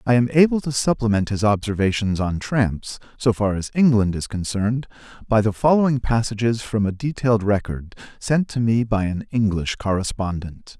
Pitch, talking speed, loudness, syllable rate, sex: 110 Hz, 165 wpm, -21 LUFS, 5.1 syllables/s, male